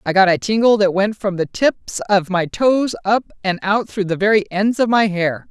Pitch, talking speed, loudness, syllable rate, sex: 200 Hz, 240 wpm, -17 LUFS, 4.7 syllables/s, female